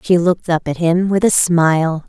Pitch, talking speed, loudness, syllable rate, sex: 170 Hz, 230 wpm, -15 LUFS, 5.1 syllables/s, female